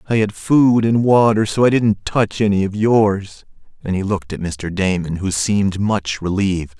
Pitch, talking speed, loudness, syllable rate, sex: 100 Hz, 195 wpm, -17 LUFS, 4.7 syllables/s, male